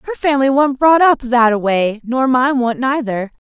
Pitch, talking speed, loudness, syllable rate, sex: 250 Hz, 205 wpm, -14 LUFS, 4.8 syllables/s, female